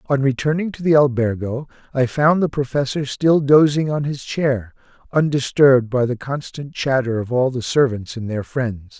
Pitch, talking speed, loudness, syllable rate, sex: 135 Hz, 175 wpm, -19 LUFS, 4.7 syllables/s, male